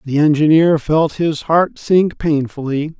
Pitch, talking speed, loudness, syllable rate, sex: 155 Hz, 140 wpm, -15 LUFS, 3.8 syllables/s, male